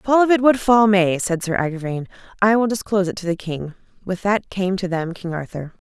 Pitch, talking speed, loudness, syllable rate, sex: 190 Hz, 235 wpm, -19 LUFS, 5.5 syllables/s, female